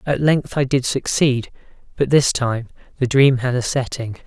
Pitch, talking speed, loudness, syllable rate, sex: 130 Hz, 185 wpm, -19 LUFS, 4.5 syllables/s, male